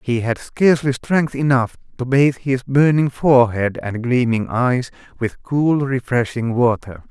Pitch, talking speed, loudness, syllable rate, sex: 125 Hz, 145 wpm, -18 LUFS, 4.2 syllables/s, male